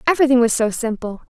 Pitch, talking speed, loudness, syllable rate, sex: 240 Hz, 180 wpm, -18 LUFS, 7.3 syllables/s, female